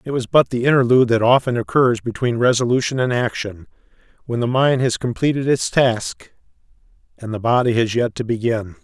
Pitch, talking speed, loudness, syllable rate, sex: 120 Hz, 175 wpm, -18 LUFS, 5.5 syllables/s, male